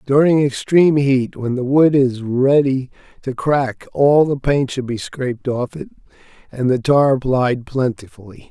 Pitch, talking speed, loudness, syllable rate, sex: 130 Hz, 160 wpm, -17 LUFS, 4.3 syllables/s, male